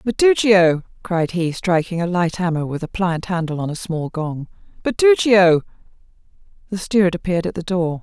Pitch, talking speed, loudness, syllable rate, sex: 180 Hz, 165 wpm, -18 LUFS, 5.0 syllables/s, female